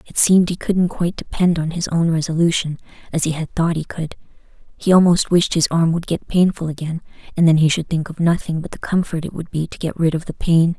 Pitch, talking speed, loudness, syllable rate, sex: 165 Hz, 245 wpm, -18 LUFS, 5.9 syllables/s, female